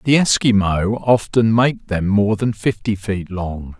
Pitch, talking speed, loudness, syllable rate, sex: 105 Hz, 160 wpm, -18 LUFS, 3.8 syllables/s, male